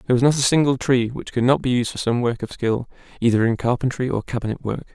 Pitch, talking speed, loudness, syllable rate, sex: 125 Hz, 265 wpm, -21 LUFS, 6.6 syllables/s, male